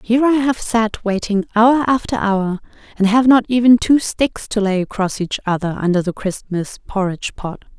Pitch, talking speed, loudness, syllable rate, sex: 215 Hz, 185 wpm, -17 LUFS, 5.0 syllables/s, female